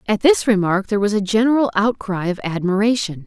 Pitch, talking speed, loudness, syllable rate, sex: 210 Hz, 185 wpm, -18 LUFS, 5.9 syllables/s, female